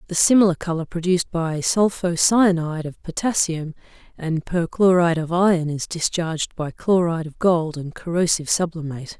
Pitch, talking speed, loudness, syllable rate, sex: 170 Hz, 145 wpm, -21 LUFS, 5.4 syllables/s, female